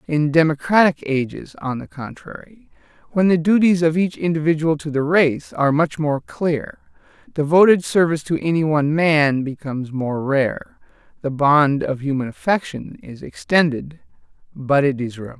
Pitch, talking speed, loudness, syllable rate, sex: 150 Hz, 150 wpm, -19 LUFS, 4.8 syllables/s, male